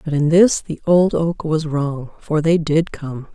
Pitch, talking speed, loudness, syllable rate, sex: 155 Hz, 215 wpm, -17 LUFS, 3.9 syllables/s, female